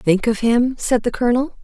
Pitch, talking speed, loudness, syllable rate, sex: 235 Hz, 220 wpm, -18 LUFS, 5.2 syllables/s, female